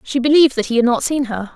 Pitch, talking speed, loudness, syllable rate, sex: 260 Hz, 310 wpm, -16 LUFS, 6.9 syllables/s, female